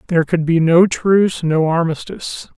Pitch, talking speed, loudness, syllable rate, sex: 170 Hz, 160 wpm, -16 LUFS, 5.1 syllables/s, male